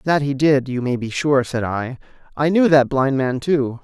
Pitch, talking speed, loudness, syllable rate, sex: 135 Hz, 235 wpm, -18 LUFS, 4.5 syllables/s, male